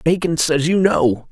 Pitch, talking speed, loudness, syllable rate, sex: 155 Hz, 185 wpm, -17 LUFS, 3.9 syllables/s, male